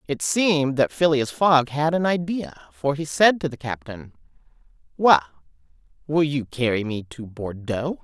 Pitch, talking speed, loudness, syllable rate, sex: 145 Hz, 155 wpm, -22 LUFS, 4.5 syllables/s, female